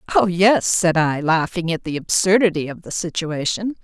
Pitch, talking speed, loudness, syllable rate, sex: 180 Hz, 170 wpm, -19 LUFS, 4.7 syllables/s, female